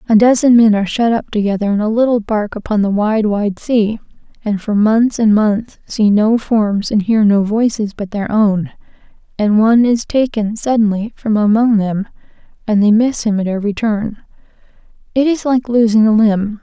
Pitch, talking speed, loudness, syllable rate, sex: 215 Hz, 190 wpm, -14 LUFS, 4.9 syllables/s, female